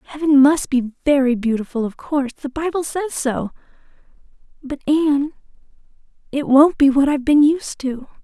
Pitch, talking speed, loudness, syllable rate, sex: 280 Hz, 145 wpm, -18 LUFS, 5.0 syllables/s, female